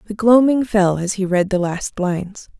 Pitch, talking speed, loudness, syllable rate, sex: 200 Hz, 210 wpm, -17 LUFS, 4.7 syllables/s, female